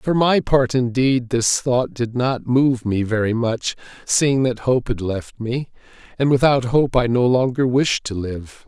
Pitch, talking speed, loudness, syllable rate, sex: 125 Hz, 185 wpm, -19 LUFS, 3.9 syllables/s, male